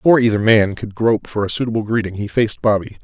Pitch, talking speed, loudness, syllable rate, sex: 110 Hz, 235 wpm, -17 LUFS, 7.1 syllables/s, male